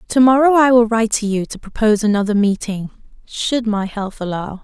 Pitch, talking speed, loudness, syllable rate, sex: 220 Hz, 180 wpm, -16 LUFS, 5.6 syllables/s, female